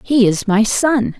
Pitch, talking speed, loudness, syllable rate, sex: 235 Hz, 200 wpm, -15 LUFS, 3.7 syllables/s, female